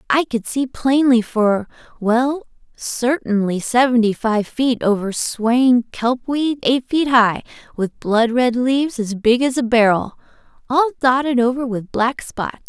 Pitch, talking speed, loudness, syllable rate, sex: 245 Hz, 150 wpm, -18 LUFS, 3.9 syllables/s, female